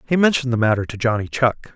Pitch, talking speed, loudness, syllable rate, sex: 125 Hz, 240 wpm, -19 LUFS, 6.9 syllables/s, male